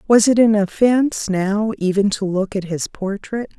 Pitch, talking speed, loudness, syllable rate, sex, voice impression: 205 Hz, 185 wpm, -18 LUFS, 4.4 syllables/s, female, feminine, middle-aged, slightly weak, soft, slightly muffled, intellectual, calm, reassuring, elegant, kind, modest